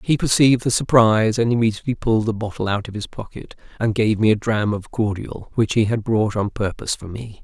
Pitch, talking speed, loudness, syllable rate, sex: 110 Hz, 225 wpm, -20 LUFS, 5.9 syllables/s, male